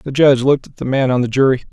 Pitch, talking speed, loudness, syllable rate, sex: 130 Hz, 315 wpm, -15 LUFS, 7.4 syllables/s, male